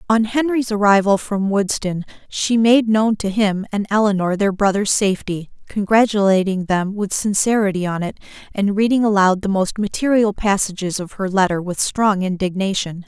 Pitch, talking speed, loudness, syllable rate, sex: 200 Hz, 155 wpm, -18 LUFS, 5.0 syllables/s, female